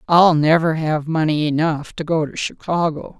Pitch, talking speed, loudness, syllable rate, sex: 160 Hz, 170 wpm, -18 LUFS, 4.6 syllables/s, female